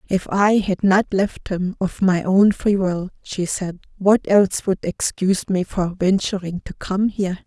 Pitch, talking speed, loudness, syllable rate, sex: 190 Hz, 185 wpm, -20 LUFS, 4.4 syllables/s, female